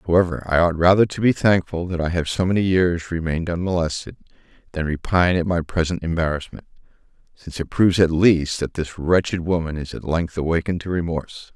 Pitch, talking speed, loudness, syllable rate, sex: 85 Hz, 185 wpm, -20 LUFS, 6.1 syllables/s, male